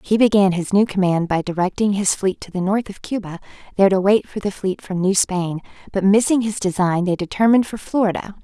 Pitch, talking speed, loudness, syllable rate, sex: 195 Hz, 220 wpm, -19 LUFS, 5.8 syllables/s, female